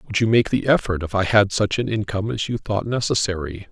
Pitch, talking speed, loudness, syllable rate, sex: 105 Hz, 240 wpm, -21 LUFS, 5.9 syllables/s, male